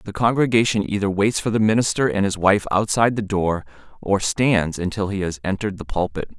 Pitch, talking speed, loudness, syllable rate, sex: 105 Hz, 195 wpm, -20 LUFS, 5.7 syllables/s, male